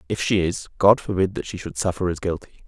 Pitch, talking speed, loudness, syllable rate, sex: 95 Hz, 245 wpm, -22 LUFS, 6.2 syllables/s, male